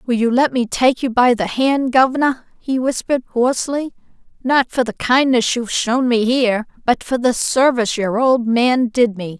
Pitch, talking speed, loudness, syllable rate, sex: 245 Hz, 190 wpm, -17 LUFS, 4.9 syllables/s, female